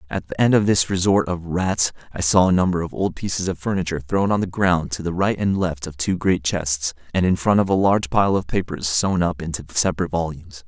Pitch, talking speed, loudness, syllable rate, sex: 90 Hz, 245 wpm, -20 LUFS, 5.7 syllables/s, male